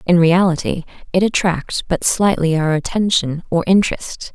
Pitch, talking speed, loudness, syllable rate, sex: 175 Hz, 140 wpm, -17 LUFS, 4.7 syllables/s, female